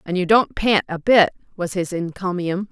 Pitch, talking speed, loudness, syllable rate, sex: 185 Hz, 200 wpm, -19 LUFS, 4.8 syllables/s, female